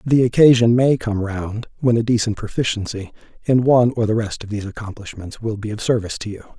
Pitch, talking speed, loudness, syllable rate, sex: 110 Hz, 210 wpm, -19 LUFS, 6.0 syllables/s, male